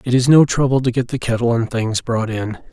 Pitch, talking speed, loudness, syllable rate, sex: 120 Hz, 265 wpm, -17 LUFS, 5.5 syllables/s, male